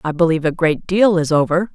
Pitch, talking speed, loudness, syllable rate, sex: 170 Hz, 240 wpm, -16 LUFS, 6.1 syllables/s, female